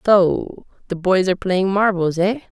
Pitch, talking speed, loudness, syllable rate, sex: 190 Hz, 165 wpm, -18 LUFS, 4.4 syllables/s, female